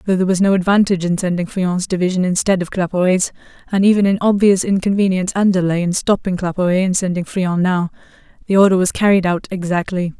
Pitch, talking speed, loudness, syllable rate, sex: 185 Hz, 190 wpm, -16 LUFS, 6.6 syllables/s, female